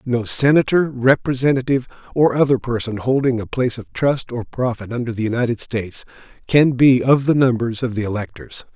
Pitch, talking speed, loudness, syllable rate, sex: 120 Hz, 170 wpm, -18 LUFS, 5.6 syllables/s, male